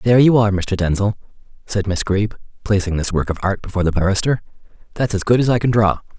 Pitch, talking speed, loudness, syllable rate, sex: 100 Hz, 225 wpm, -18 LUFS, 6.6 syllables/s, male